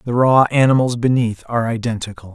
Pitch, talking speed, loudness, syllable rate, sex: 120 Hz, 155 wpm, -16 LUFS, 6.1 syllables/s, male